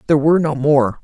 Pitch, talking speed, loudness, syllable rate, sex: 150 Hz, 235 wpm, -15 LUFS, 7.2 syllables/s, female